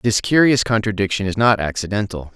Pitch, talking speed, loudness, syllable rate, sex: 105 Hz, 155 wpm, -18 LUFS, 5.8 syllables/s, male